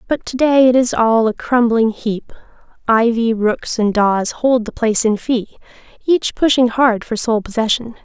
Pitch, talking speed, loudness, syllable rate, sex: 230 Hz, 170 wpm, -15 LUFS, 4.5 syllables/s, female